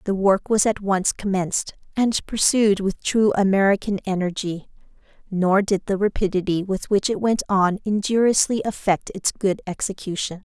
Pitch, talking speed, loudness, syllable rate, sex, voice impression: 200 Hz, 150 wpm, -21 LUFS, 4.8 syllables/s, female, feminine, slightly adult-like, fluent, cute, friendly, slightly kind